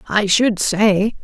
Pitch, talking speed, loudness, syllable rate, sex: 205 Hz, 145 wpm, -16 LUFS, 3.0 syllables/s, female